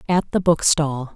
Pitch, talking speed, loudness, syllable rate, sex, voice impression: 155 Hz, 155 wpm, -19 LUFS, 4.1 syllables/s, female, feminine, adult-like, tensed, slightly soft, fluent, slightly raspy, calm, reassuring, elegant, slightly sharp, modest